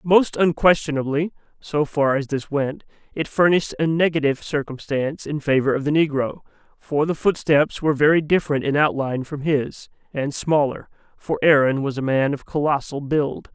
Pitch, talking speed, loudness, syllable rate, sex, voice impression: 150 Hz, 165 wpm, -21 LUFS, 5.2 syllables/s, male, masculine, slightly old, muffled, slightly intellectual, slightly calm, elegant